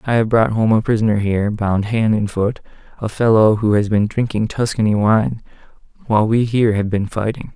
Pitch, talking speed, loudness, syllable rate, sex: 110 Hz, 190 wpm, -17 LUFS, 5.4 syllables/s, male